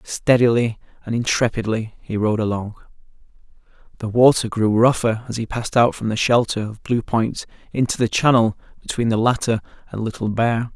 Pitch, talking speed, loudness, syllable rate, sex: 115 Hz, 160 wpm, -20 LUFS, 5.5 syllables/s, male